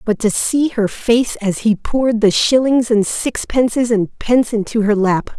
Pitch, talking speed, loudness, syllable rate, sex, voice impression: 225 Hz, 190 wpm, -16 LUFS, 4.4 syllables/s, female, very feminine, middle-aged, thin, tensed, slightly powerful, bright, soft, clear, fluent, slightly raspy, slightly cute, cool, intellectual, slightly refreshing, sincere, calm, very friendly, reassuring, very unique, slightly elegant, slightly wild, slightly sweet, lively, kind, slightly intense, slightly sharp